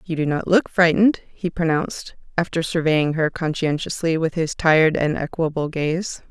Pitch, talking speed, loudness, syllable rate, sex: 165 Hz, 160 wpm, -20 LUFS, 4.9 syllables/s, female